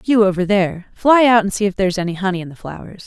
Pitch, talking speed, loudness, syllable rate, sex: 195 Hz, 295 wpm, -16 LUFS, 7.3 syllables/s, female